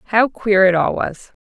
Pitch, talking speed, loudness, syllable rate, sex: 205 Hz, 210 wpm, -16 LUFS, 3.8 syllables/s, female